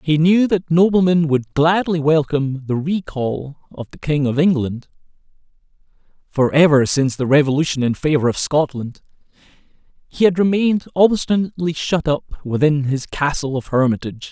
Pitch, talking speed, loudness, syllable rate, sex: 155 Hz, 145 wpm, -17 LUFS, 5.1 syllables/s, male